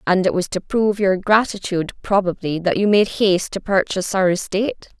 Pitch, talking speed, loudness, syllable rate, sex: 190 Hz, 190 wpm, -19 LUFS, 5.6 syllables/s, female